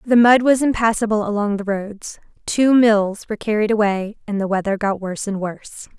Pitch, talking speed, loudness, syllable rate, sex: 210 Hz, 190 wpm, -18 LUFS, 5.3 syllables/s, female